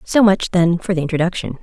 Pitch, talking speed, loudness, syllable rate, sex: 180 Hz, 220 wpm, -17 LUFS, 6.0 syllables/s, female